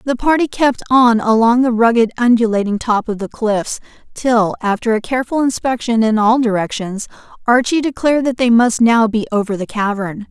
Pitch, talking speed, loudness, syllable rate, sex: 230 Hz, 175 wpm, -15 LUFS, 5.2 syllables/s, female